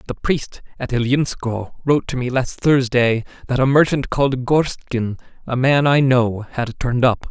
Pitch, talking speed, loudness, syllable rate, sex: 130 Hz, 175 wpm, -18 LUFS, 4.8 syllables/s, male